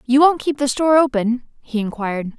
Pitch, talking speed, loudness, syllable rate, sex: 255 Hz, 200 wpm, -18 LUFS, 5.6 syllables/s, female